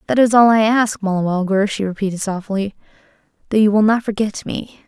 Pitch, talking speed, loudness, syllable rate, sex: 210 Hz, 185 wpm, -17 LUFS, 5.6 syllables/s, female